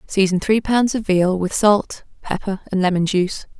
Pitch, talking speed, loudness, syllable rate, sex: 195 Hz, 185 wpm, -19 LUFS, 4.8 syllables/s, female